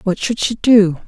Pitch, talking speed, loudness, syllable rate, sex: 205 Hz, 225 wpm, -14 LUFS, 4.3 syllables/s, female